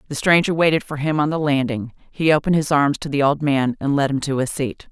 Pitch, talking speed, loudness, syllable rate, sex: 145 Hz, 270 wpm, -19 LUFS, 6.0 syllables/s, female